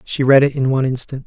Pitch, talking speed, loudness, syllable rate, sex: 135 Hz, 285 wpm, -16 LUFS, 6.8 syllables/s, male